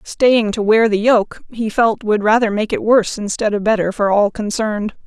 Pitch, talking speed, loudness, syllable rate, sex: 215 Hz, 215 wpm, -16 LUFS, 5.0 syllables/s, female